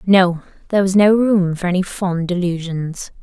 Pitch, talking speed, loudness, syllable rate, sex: 185 Hz, 165 wpm, -17 LUFS, 4.7 syllables/s, female